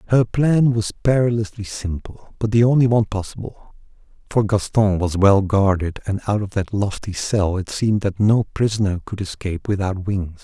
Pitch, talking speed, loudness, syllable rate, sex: 105 Hz, 170 wpm, -20 LUFS, 5.0 syllables/s, male